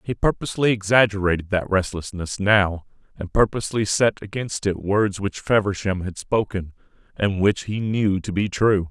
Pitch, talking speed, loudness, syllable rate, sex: 100 Hz, 155 wpm, -22 LUFS, 4.8 syllables/s, male